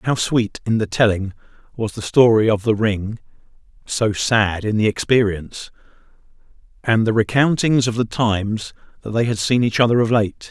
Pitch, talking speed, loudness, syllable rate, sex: 110 Hz, 170 wpm, -18 LUFS, 4.9 syllables/s, male